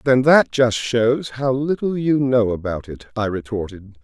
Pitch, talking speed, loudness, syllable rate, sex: 120 Hz, 180 wpm, -19 LUFS, 4.2 syllables/s, male